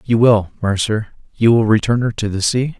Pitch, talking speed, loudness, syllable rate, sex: 110 Hz, 195 wpm, -16 LUFS, 5.1 syllables/s, male